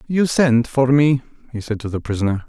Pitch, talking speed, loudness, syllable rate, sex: 125 Hz, 220 wpm, -18 LUFS, 5.5 syllables/s, male